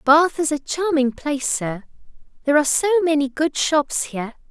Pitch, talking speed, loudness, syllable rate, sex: 295 Hz, 175 wpm, -20 LUFS, 5.4 syllables/s, female